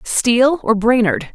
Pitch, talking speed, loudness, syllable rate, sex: 225 Hz, 135 wpm, -15 LUFS, 4.3 syllables/s, female